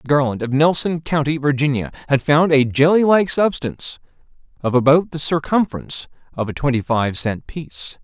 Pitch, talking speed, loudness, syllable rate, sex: 145 Hz, 155 wpm, -18 LUFS, 5.3 syllables/s, male